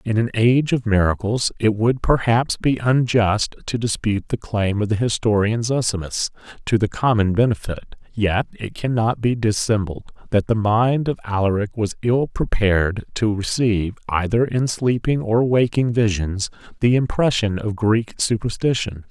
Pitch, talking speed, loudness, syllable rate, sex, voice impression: 110 Hz, 150 wpm, -20 LUFS, 4.7 syllables/s, male, masculine, slightly middle-aged, thick, tensed, powerful, slightly soft, raspy, cool, intellectual, slightly mature, friendly, wild, lively, kind